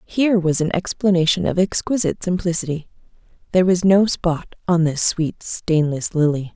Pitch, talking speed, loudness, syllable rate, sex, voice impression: 175 Hz, 145 wpm, -19 LUFS, 4.9 syllables/s, female, very feminine, slightly middle-aged, thin, slightly relaxed, slightly weak, bright, soft, very clear, slightly halting, cute, slightly cool, intellectual, very refreshing, sincere, very calm, friendly, very reassuring, slightly unique, elegant, sweet, lively, kind, slightly modest